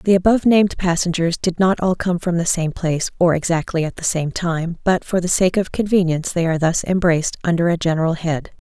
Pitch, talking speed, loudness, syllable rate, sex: 175 Hz, 220 wpm, -18 LUFS, 5.9 syllables/s, female